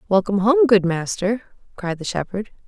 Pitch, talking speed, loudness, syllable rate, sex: 205 Hz, 155 wpm, -20 LUFS, 5.1 syllables/s, female